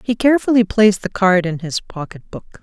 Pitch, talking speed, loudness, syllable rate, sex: 200 Hz, 205 wpm, -16 LUFS, 5.8 syllables/s, female